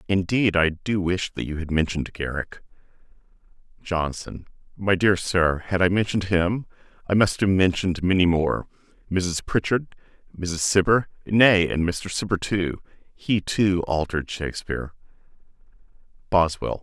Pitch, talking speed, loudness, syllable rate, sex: 90 Hz, 130 wpm, -23 LUFS, 4.6 syllables/s, male